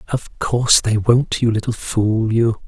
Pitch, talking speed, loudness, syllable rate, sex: 115 Hz, 180 wpm, -17 LUFS, 4.2 syllables/s, male